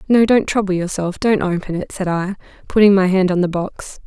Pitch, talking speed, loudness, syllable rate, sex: 190 Hz, 205 wpm, -17 LUFS, 5.4 syllables/s, female